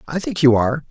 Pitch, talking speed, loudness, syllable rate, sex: 145 Hz, 265 wpm, -17 LUFS, 6.9 syllables/s, male